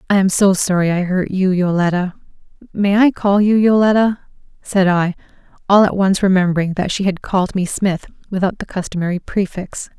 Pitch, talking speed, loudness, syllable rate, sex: 190 Hz, 170 wpm, -16 LUFS, 5.3 syllables/s, female